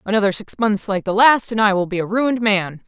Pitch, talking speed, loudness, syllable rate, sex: 210 Hz, 270 wpm, -17 LUFS, 5.8 syllables/s, female